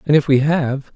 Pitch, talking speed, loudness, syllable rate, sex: 140 Hz, 250 wpm, -17 LUFS, 6.9 syllables/s, male